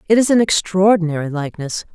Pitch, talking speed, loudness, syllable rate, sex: 185 Hz, 155 wpm, -17 LUFS, 6.4 syllables/s, female